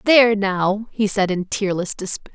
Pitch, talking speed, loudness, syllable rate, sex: 200 Hz, 180 wpm, -19 LUFS, 4.6 syllables/s, female